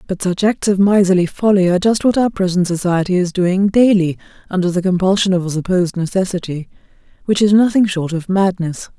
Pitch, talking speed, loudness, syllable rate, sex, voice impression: 185 Hz, 185 wpm, -15 LUFS, 5.8 syllables/s, female, feminine, middle-aged, slightly weak, soft, fluent, raspy, intellectual, calm, slightly reassuring, elegant, kind